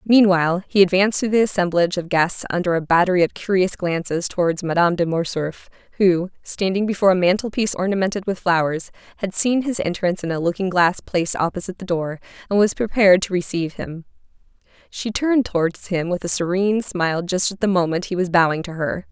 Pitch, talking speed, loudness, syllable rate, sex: 185 Hz, 195 wpm, -20 LUFS, 6.1 syllables/s, female